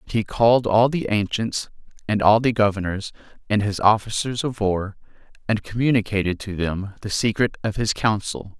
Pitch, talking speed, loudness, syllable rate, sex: 105 Hz, 165 wpm, -21 LUFS, 5.1 syllables/s, male